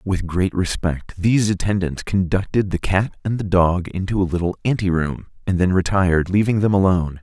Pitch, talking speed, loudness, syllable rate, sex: 95 Hz, 185 wpm, -20 LUFS, 5.3 syllables/s, male